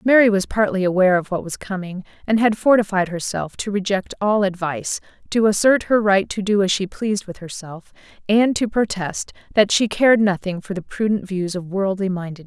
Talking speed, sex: 200 wpm, female